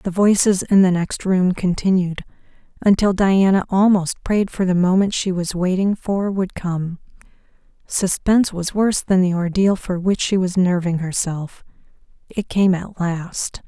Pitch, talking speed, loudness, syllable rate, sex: 185 Hz, 160 wpm, -19 LUFS, 4.4 syllables/s, female